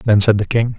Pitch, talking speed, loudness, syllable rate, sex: 110 Hz, 305 wpm, -15 LUFS, 5.3 syllables/s, male